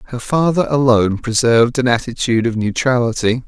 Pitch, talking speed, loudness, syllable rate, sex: 120 Hz, 140 wpm, -15 LUFS, 6.0 syllables/s, male